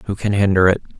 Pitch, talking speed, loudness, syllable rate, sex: 95 Hz, 240 wpm, -16 LUFS, 6.3 syllables/s, male